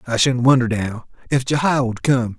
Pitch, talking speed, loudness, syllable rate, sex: 125 Hz, 200 wpm, -18 LUFS, 4.9 syllables/s, male